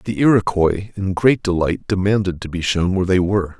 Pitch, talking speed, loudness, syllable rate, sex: 95 Hz, 200 wpm, -18 LUFS, 5.4 syllables/s, male